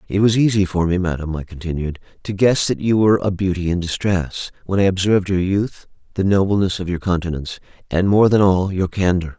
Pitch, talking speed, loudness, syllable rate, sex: 95 Hz, 210 wpm, -18 LUFS, 5.8 syllables/s, male